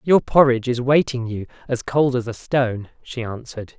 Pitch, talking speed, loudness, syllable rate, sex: 125 Hz, 175 wpm, -20 LUFS, 5.3 syllables/s, male